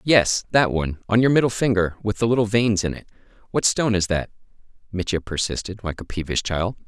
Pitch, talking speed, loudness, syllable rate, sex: 100 Hz, 200 wpm, -22 LUFS, 6.0 syllables/s, male